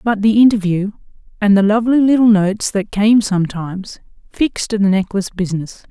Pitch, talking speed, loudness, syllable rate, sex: 205 Hz, 150 wpm, -15 LUFS, 5.7 syllables/s, female